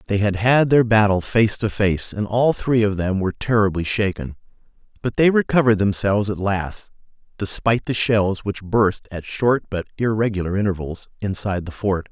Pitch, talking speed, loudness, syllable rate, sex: 105 Hz, 175 wpm, -20 LUFS, 5.2 syllables/s, male